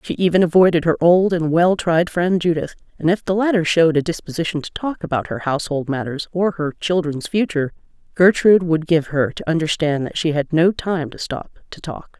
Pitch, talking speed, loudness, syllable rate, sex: 165 Hz, 205 wpm, -18 LUFS, 5.6 syllables/s, female